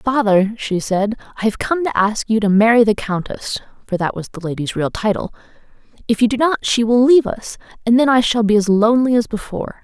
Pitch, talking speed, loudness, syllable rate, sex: 220 Hz, 215 wpm, -17 LUFS, 5.6 syllables/s, female